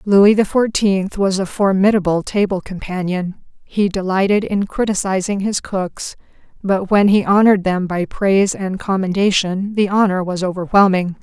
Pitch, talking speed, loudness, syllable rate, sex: 195 Hz, 145 wpm, -16 LUFS, 4.7 syllables/s, female